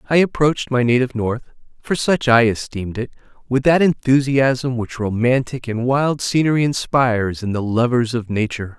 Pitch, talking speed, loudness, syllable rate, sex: 125 Hz, 165 wpm, -18 LUFS, 5.2 syllables/s, male